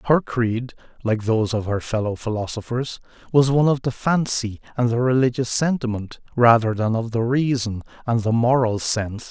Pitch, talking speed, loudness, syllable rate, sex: 120 Hz, 170 wpm, -21 LUFS, 5.2 syllables/s, male